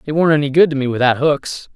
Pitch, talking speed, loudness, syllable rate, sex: 145 Hz, 275 wpm, -15 LUFS, 6.2 syllables/s, male